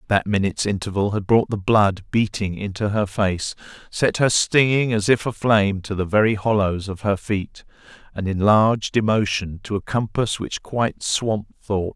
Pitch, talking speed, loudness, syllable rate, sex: 105 Hz, 170 wpm, -21 LUFS, 4.8 syllables/s, male